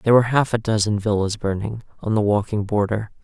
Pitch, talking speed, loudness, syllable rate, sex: 105 Hz, 205 wpm, -21 LUFS, 6.1 syllables/s, male